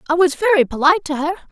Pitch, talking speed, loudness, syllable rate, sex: 325 Hz, 240 wpm, -16 LUFS, 7.8 syllables/s, female